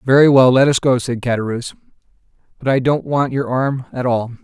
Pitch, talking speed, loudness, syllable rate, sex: 130 Hz, 205 wpm, -16 LUFS, 5.7 syllables/s, male